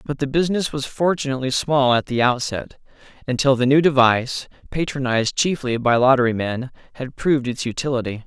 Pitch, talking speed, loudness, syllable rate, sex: 130 Hz, 160 wpm, -20 LUFS, 5.9 syllables/s, male